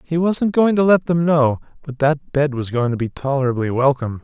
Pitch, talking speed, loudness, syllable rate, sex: 145 Hz, 225 wpm, -18 LUFS, 5.4 syllables/s, male